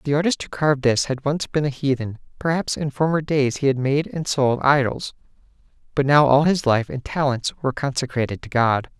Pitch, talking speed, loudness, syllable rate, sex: 140 Hz, 205 wpm, -21 LUFS, 5.4 syllables/s, male